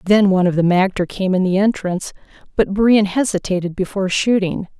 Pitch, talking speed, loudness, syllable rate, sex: 190 Hz, 175 wpm, -17 LUFS, 5.8 syllables/s, female